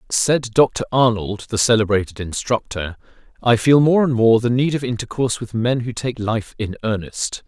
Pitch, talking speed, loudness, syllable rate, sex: 115 Hz, 175 wpm, -19 LUFS, 4.8 syllables/s, male